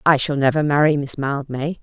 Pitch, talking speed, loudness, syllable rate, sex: 145 Hz, 195 wpm, -19 LUFS, 5.2 syllables/s, female